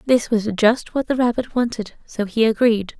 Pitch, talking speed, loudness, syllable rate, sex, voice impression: 230 Hz, 200 wpm, -19 LUFS, 4.9 syllables/s, female, feminine, adult-like, relaxed, slightly weak, soft, muffled, intellectual, calm, slightly friendly, unique, slightly lively, slightly modest